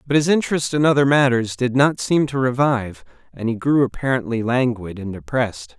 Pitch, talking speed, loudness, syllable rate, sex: 125 Hz, 185 wpm, -19 LUFS, 5.6 syllables/s, male